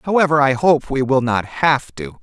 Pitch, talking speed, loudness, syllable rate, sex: 135 Hz, 215 wpm, -16 LUFS, 4.6 syllables/s, male